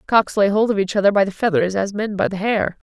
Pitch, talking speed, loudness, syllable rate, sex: 200 Hz, 290 wpm, -19 LUFS, 6.0 syllables/s, female